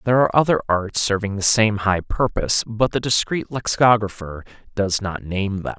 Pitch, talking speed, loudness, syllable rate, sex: 105 Hz, 175 wpm, -20 LUFS, 5.3 syllables/s, male